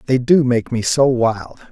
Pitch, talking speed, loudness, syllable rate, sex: 120 Hz, 210 wpm, -16 LUFS, 4.2 syllables/s, male